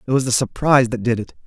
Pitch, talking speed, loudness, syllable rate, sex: 125 Hz, 285 wpm, -18 LUFS, 7.2 syllables/s, male